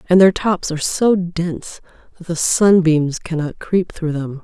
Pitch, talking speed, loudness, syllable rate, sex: 170 Hz, 175 wpm, -17 LUFS, 4.4 syllables/s, female